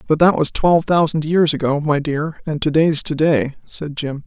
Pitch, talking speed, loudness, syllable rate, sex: 155 Hz, 225 wpm, -17 LUFS, 4.8 syllables/s, female